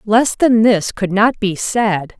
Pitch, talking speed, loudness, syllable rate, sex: 210 Hz, 190 wpm, -15 LUFS, 3.5 syllables/s, female